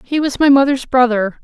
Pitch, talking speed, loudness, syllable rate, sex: 260 Hz, 210 wpm, -14 LUFS, 5.3 syllables/s, female